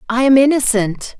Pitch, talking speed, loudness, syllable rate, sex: 245 Hz, 150 wpm, -14 LUFS, 5.0 syllables/s, female